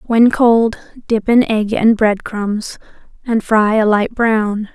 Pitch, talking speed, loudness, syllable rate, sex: 220 Hz, 165 wpm, -14 LUFS, 3.2 syllables/s, female